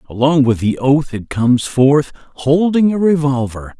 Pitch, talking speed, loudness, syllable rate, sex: 140 Hz, 160 wpm, -15 LUFS, 4.6 syllables/s, male